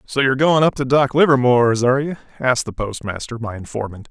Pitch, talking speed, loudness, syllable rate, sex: 125 Hz, 205 wpm, -18 LUFS, 6.3 syllables/s, male